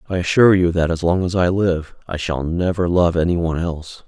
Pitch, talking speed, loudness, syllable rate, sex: 85 Hz, 235 wpm, -18 LUFS, 5.9 syllables/s, male